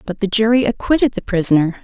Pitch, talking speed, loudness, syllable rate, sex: 210 Hz, 195 wpm, -16 LUFS, 6.4 syllables/s, female